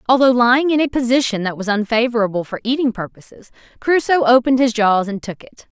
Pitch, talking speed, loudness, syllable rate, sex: 235 Hz, 185 wpm, -16 LUFS, 6.1 syllables/s, female